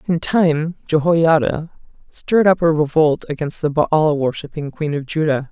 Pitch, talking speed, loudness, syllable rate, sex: 155 Hz, 150 wpm, -17 LUFS, 4.5 syllables/s, female